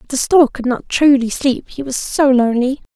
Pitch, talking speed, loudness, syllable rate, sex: 265 Hz, 225 wpm, -15 LUFS, 5.1 syllables/s, female